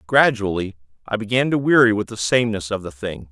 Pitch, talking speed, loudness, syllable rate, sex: 105 Hz, 200 wpm, -19 LUFS, 5.9 syllables/s, male